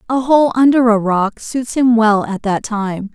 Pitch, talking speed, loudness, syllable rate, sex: 230 Hz, 210 wpm, -14 LUFS, 4.1 syllables/s, female